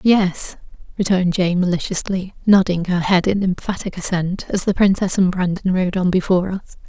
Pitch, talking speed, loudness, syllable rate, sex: 185 Hz, 165 wpm, -18 LUFS, 5.3 syllables/s, female